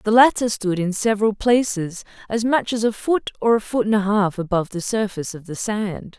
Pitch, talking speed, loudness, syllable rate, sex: 210 Hz, 225 wpm, -21 LUFS, 5.3 syllables/s, female